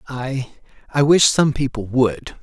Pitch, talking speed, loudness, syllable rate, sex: 130 Hz, 125 wpm, -18 LUFS, 3.8 syllables/s, male